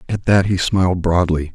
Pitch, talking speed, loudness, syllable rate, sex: 90 Hz, 195 wpm, -17 LUFS, 5.1 syllables/s, male